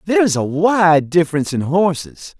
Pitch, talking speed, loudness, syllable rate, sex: 175 Hz, 175 wpm, -15 LUFS, 5.4 syllables/s, male